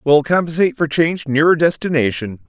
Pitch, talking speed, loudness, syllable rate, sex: 155 Hz, 145 wpm, -16 LUFS, 5.9 syllables/s, male